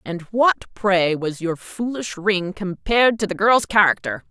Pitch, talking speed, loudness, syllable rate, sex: 195 Hz, 165 wpm, -20 LUFS, 4.2 syllables/s, female